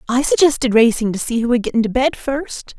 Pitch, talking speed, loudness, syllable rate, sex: 240 Hz, 235 wpm, -16 LUFS, 5.8 syllables/s, female